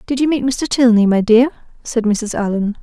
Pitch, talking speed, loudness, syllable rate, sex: 235 Hz, 210 wpm, -15 LUFS, 5.2 syllables/s, female